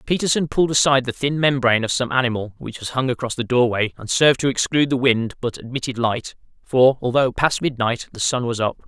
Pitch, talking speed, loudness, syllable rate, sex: 125 Hz, 210 wpm, -20 LUFS, 6.0 syllables/s, male